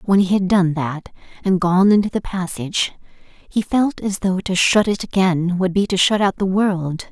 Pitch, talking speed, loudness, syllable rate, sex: 190 Hz, 210 wpm, -18 LUFS, 4.6 syllables/s, female